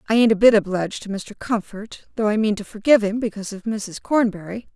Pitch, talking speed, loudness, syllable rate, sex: 215 Hz, 225 wpm, -20 LUFS, 6.3 syllables/s, female